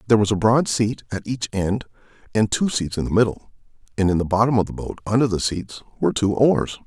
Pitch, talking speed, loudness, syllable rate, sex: 110 Hz, 235 wpm, -21 LUFS, 6.0 syllables/s, male